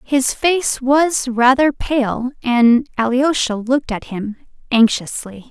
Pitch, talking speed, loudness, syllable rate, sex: 255 Hz, 120 wpm, -16 LUFS, 3.5 syllables/s, female